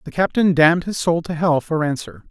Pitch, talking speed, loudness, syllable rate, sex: 160 Hz, 235 wpm, -18 LUFS, 5.6 syllables/s, male